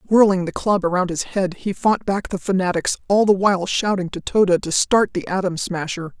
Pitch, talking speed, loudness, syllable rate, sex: 190 Hz, 215 wpm, -19 LUFS, 5.1 syllables/s, female